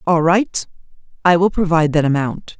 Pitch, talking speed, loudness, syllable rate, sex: 170 Hz, 160 wpm, -16 LUFS, 5.2 syllables/s, female